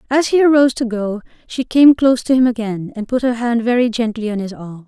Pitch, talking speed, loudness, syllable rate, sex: 235 Hz, 245 wpm, -16 LUFS, 5.9 syllables/s, female